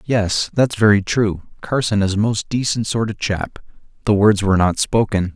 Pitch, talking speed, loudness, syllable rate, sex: 105 Hz, 190 wpm, -18 LUFS, 4.8 syllables/s, male